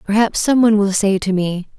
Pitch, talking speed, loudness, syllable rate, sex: 205 Hz, 200 wpm, -16 LUFS, 5.7 syllables/s, female